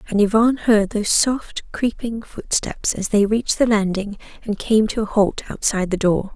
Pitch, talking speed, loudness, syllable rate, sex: 210 Hz, 190 wpm, -19 LUFS, 5.0 syllables/s, female